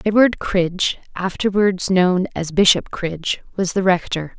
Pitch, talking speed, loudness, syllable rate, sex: 185 Hz, 135 wpm, -18 LUFS, 4.5 syllables/s, female